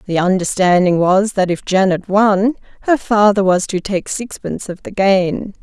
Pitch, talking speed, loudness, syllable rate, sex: 195 Hz, 170 wpm, -15 LUFS, 4.5 syllables/s, female